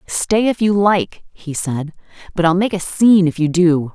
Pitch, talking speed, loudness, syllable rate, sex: 180 Hz, 215 wpm, -16 LUFS, 4.5 syllables/s, female